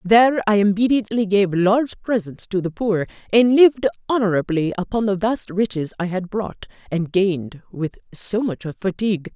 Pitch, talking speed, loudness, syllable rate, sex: 200 Hz, 160 wpm, -20 LUFS, 5.2 syllables/s, female